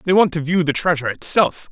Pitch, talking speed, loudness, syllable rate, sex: 165 Hz, 245 wpm, -18 LUFS, 6.0 syllables/s, male